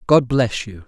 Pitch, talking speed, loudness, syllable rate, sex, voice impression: 120 Hz, 205 wpm, -19 LUFS, 4.1 syllables/s, male, masculine, adult-like, slightly muffled, sincere, calm, slightly reassuring